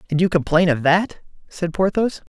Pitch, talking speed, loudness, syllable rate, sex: 175 Hz, 180 wpm, -19 LUFS, 5.0 syllables/s, male